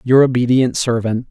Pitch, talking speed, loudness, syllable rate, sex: 125 Hz, 140 wpm, -15 LUFS, 5.0 syllables/s, male